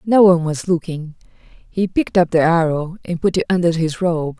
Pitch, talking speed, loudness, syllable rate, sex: 170 Hz, 205 wpm, -17 LUFS, 5.3 syllables/s, female